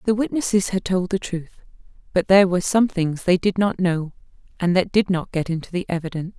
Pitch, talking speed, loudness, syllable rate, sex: 185 Hz, 215 wpm, -21 LUFS, 5.9 syllables/s, female